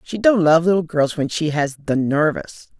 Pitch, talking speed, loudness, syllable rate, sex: 160 Hz, 215 wpm, -18 LUFS, 4.6 syllables/s, female